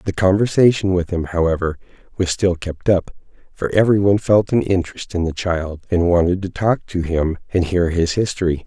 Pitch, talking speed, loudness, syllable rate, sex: 90 Hz, 185 wpm, -18 LUFS, 5.3 syllables/s, male